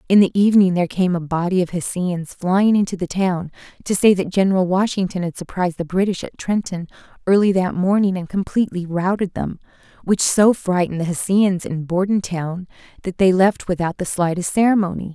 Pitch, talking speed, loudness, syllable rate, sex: 185 Hz, 180 wpm, -19 LUFS, 5.6 syllables/s, female